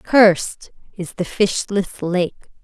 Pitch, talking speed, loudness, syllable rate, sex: 190 Hz, 115 wpm, -19 LUFS, 3.3 syllables/s, female